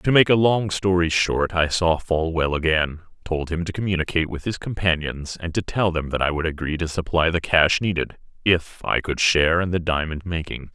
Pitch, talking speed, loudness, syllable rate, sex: 85 Hz, 210 wpm, -22 LUFS, 5.2 syllables/s, male